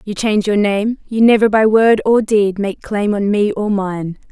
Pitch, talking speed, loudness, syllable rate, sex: 210 Hz, 220 wpm, -15 LUFS, 4.5 syllables/s, female